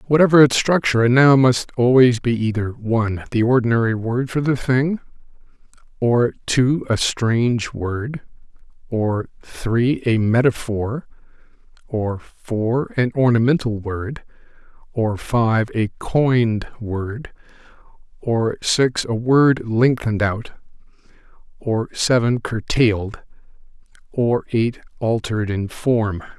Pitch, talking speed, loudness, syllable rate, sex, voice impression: 120 Hz, 110 wpm, -19 LUFS, 4.4 syllables/s, male, masculine, middle-aged, slightly thick, slightly relaxed, powerful, slightly hard, muffled, slightly raspy, intellectual, mature, wild, slightly strict